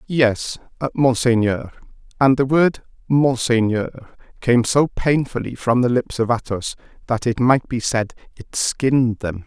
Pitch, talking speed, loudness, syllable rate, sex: 125 Hz, 140 wpm, -19 LUFS, 4.0 syllables/s, male